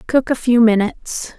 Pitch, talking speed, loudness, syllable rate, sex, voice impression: 235 Hz, 175 wpm, -16 LUFS, 4.9 syllables/s, female, feminine, slightly young, slightly weak, bright, soft, slightly halting, cute, friendly, reassuring, slightly sweet, kind, modest